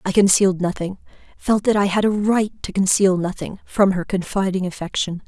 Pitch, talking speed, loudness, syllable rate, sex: 190 Hz, 160 wpm, -19 LUFS, 5.3 syllables/s, female